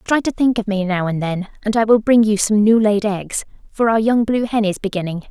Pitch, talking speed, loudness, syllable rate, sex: 210 Hz, 270 wpm, -17 LUFS, 5.4 syllables/s, female